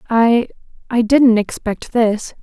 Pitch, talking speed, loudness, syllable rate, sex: 230 Hz, 75 wpm, -16 LUFS, 3.4 syllables/s, female